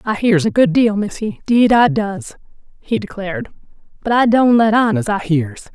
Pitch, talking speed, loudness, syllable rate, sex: 210 Hz, 200 wpm, -15 LUFS, 4.7 syllables/s, female